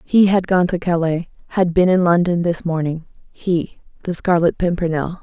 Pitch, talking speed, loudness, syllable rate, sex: 175 Hz, 170 wpm, -18 LUFS, 4.8 syllables/s, female